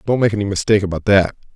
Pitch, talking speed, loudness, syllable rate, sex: 100 Hz, 230 wpm, -17 LUFS, 7.8 syllables/s, male